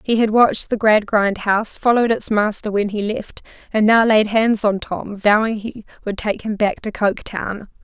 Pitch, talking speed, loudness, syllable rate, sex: 215 Hz, 200 wpm, -18 LUFS, 4.9 syllables/s, female